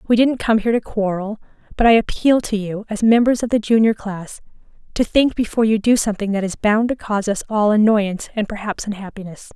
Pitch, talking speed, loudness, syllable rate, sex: 215 Hz, 215 wpm, -18 LUFS, 6.0 syllables/s, female